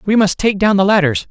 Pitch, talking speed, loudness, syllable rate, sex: 195 Hz, 275 wpm, -13 LUFS, 5.9 syllables/s, male